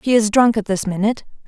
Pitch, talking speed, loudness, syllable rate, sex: 215 Hz, 245 wpm, -17 LUFS, 6.8 syllables/s, female